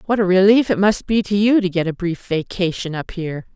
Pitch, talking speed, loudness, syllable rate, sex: 190 Hz, 255 wpm, -18 LUFS, 5.7 syllables/s, female